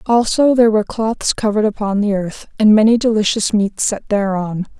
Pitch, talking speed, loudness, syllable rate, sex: 210 Hz, 175 wpm, -15 LUFS, 5.4 syllables/s, female